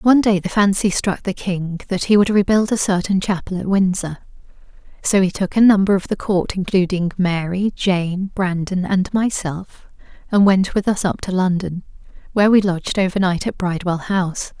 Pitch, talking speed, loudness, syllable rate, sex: 190 Hz, 185 wpm, -18 LUFS, 5.1 syllables/s, female